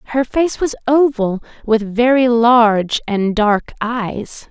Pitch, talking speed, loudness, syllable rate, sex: 230 Hz, 135 wpm, -15 LUFS, 3.5 syllables/s, female